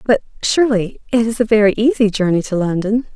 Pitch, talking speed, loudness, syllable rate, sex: 215 Hz, 190 wpm, -16 LUFS, 5.9 syllables/s, female